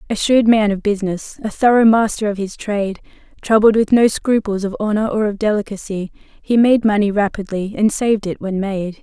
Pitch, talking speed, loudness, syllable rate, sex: 210 Hz, 195 wpm, -17 LUFS, 5.5 syllables/s, female